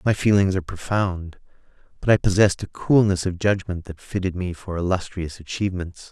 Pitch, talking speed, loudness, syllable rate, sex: 95 Hz, 165 wpm, -22 LUFS, 5.6 syllables/s, male